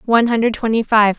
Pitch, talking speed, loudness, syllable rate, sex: 225 Hz, 205 wpm, -16 LUFS, 6.5 syllables/s, female